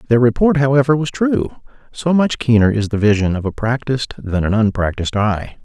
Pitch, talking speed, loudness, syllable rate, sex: 120 Hz, 190 wpm, -16 LUFS, 5.6 syllables/s, male